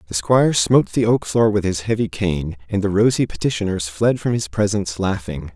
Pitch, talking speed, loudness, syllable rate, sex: 100 Hz, 205 wpm, -19 LUFS, 5.5 syllables/s, male